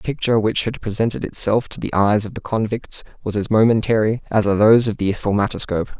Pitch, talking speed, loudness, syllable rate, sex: 110 Hz, 210 wpm, -19 LUFS, 6.4 syllables/s, male